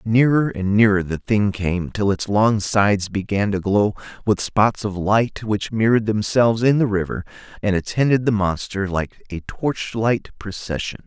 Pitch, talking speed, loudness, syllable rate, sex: 105 Hz, 170 wpm, -20 LUFS, 4.6 syllables/s, male